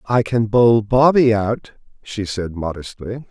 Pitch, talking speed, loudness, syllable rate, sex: 110 Hz, 145 wpm, -17 LUFS, 3.8 syllables/s, male